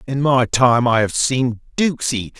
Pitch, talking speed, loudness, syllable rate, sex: 125 Hz, 200 wpm, -17 LUFS, 4.3 syllables/s, male